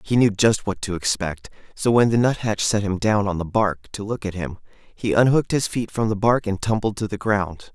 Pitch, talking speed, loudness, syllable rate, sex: 105 Hz, 250 wpm, -21 LUFS, 5.2 syllables/s, male